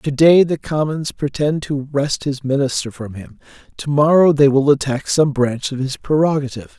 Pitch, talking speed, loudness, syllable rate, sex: 140 Hz, 185 wpm, -17 LUFS, 4.9 syllables/s, male